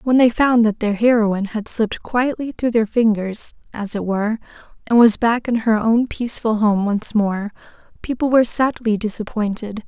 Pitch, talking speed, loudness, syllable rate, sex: 225 Hz, 175 wpm, -18 LUFS, 5.0 syllables/s, female